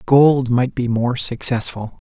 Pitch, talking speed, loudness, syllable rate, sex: 125 Hz, 145 wpm, -18 LUFS, 3.7 syllables/s, male